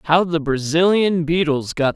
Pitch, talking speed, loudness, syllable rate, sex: 160 Hz, 155 wpm, -18 LUFS, 4.1 syllables/s, male